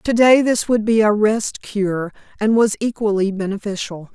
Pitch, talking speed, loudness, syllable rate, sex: 210 Hz, 160 wpm, -18 LUFS, 4.5 syllables/s, female